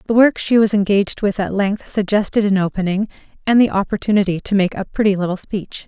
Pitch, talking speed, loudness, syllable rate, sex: 200 Hz, 205 wpm, -17 LUFS, 6.0 syllables/s, female